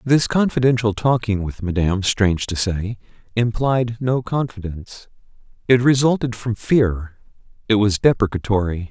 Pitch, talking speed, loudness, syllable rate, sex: 110 Hz, 115 wpm, -19 LUFS, 4.8 syllables/s, male